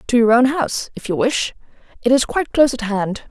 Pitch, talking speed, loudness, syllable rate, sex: 245 Hz, 220 wpm, -18 LUFS, 6.0 syllables/s, female